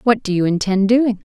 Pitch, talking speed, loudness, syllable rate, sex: 210 Hz, 220 wpm, -17 LUFS, 5.2 syllables/s, female